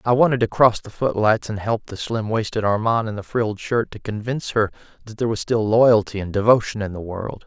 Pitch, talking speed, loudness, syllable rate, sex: 110 Hz, 235 wpm, -21 LUFS, 5.7 syllables/s, male